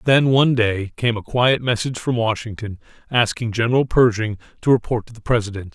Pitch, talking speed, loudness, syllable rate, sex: 115 Hz, 180 wpm, -19 LUFS, 5.7 syllables/s, male